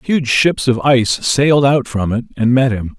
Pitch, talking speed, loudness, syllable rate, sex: 125 Hz, 220 wpm, -14 LUFS, 4.7 syllables/s, male